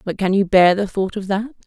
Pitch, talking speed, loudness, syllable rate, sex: 200 Hz, 290 wpm, -18 LUFS, 5.8 syllables/s, female